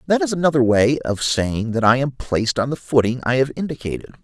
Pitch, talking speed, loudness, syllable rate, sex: 130 Hz, 225 wpm, -19 LUFS, 5.8 syllables/s, male